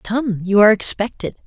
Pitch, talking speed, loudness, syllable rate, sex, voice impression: 210 Hz, 165 wpm, -16 LUFS, 5.2 syllables/s, female, feminine, very adult-like, intellectual, slightly calm, slightly strict